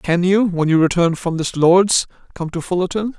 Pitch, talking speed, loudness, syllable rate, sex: 175 Hz, 205 wpm, -17 LUFS, 4.9 syllables/s, male